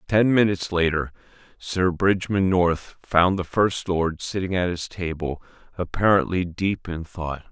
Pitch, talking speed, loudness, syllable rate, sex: 90 Hz, 145 wpm, -23 LUFS, 4.2 syllables/s, male